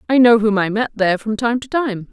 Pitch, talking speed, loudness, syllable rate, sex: 225 Hz, 285 wpm, -16 LUFS, 5.8 syllables/s, female